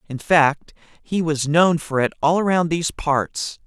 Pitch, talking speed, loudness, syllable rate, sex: 160 Hz, 180 wpm, -19 LUFS, 4.3 syllables/s, male